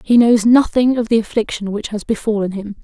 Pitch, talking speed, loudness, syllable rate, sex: 220 Hz, 210 wpm, -16 LUFS, 5.5 syllables/s, female